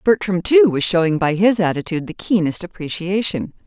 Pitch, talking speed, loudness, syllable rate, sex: 185 Hz, 165 wpm, -18 LUFS, 5.5 syllables/s, female